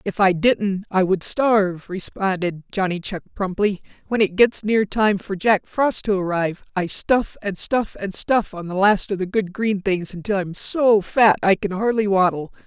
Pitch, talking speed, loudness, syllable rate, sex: 200 Hz, 200 wpm, -20 LUFS, 4.4 syllables/s, female